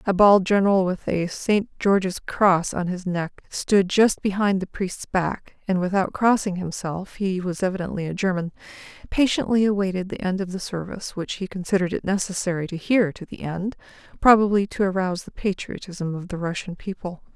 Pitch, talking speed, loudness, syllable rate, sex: 190 Hz, 180 wpm, -23 LUFS, 4.9 syllables/s, female